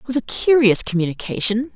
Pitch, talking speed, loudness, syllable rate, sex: 230 Hz, 170 wpm, -18 LUFS, 5.9 syllables/s, female